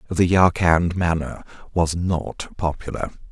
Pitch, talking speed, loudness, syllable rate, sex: 85 Hz, 110 wpm, -21 LUFS, 3.9 syllables/s, male